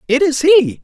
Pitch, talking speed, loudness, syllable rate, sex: 185 Hz, 215 wpm, -12 LUFS, 4.5 syllables/s, male